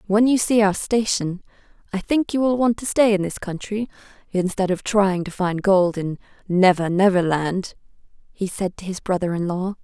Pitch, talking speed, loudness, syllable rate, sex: 195 Hz, 195 wpm, -21 LUFS, 4.8 syllables/s, female